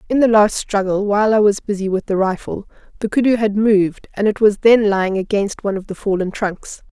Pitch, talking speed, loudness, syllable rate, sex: 205 Hz, 225 wpm, -17 LUFS, 5.8 syllables/s, female